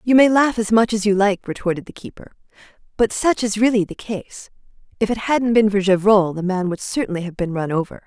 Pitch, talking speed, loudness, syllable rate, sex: 205 Hz, 230 wpm, -19 LUFS, 5.7 syllables/s, female